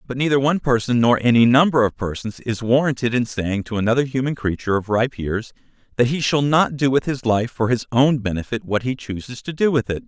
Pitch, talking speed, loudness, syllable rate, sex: 120 Hz, 230 wpm, -19 LUFS, 5.8 syllables/s, male